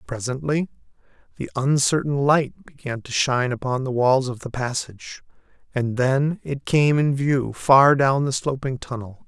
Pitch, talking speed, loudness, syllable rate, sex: 130 Hz, 155 wpm, -21 LUFS, 4.5 syllables/s, male